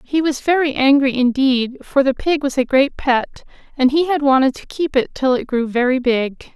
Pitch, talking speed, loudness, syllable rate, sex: 270 Hz, 220 wpm, -17 LUFS, 5.0 syllables/s, female